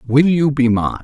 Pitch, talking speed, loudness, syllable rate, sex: 135 Hz, 230 wpm, -15 LUFS, 4.1 syllables/s, male